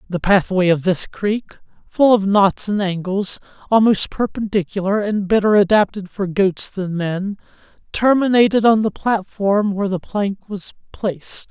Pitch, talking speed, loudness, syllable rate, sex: 200 Hz, 145 wpm, -18 LUFS, 4.5 syllables/s, male